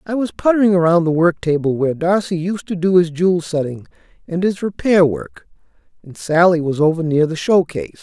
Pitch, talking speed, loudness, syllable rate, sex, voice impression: 175 Hz, 195 wpm, -16 LUFS, 5.7 syllables/s, male, masculine, middle-aged, relaxed, slightly powerful, soft, slightly muffled, raspy, calm, friendly, slightly reassuring, slightly wild, kind, slightly modest